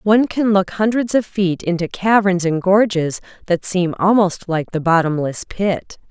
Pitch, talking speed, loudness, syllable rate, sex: 190 Hz, 165 wpm, -17 LUFS, 4.5 syllables/s, female